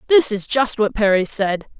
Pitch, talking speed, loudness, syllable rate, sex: 220 Hz, 200 wpm, -18 LUFS, 4.6 syllables/s, female